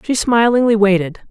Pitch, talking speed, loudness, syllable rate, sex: 215 Hz, 140 wpm, -14 LUFS, 5.0 syllables/s, female